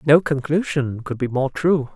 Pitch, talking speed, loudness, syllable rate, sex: 140 Hz, 185 wpm, -21 LUFS, 4.5 syllables/s, male